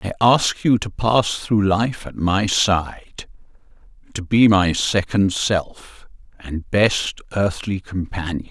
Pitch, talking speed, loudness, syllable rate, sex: 100 Hz, 125 wpm, -19 LUFS, 3.3 syllables/s, male